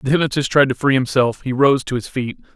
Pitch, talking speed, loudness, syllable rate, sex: 130 Hz, 260 wpm, -17 LUFS, 5.8 syllables/s, male